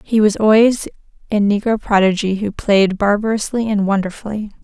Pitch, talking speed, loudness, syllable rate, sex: 210 Hz, 140 wpm, -16 LUFS, 5.2 syllables/s, female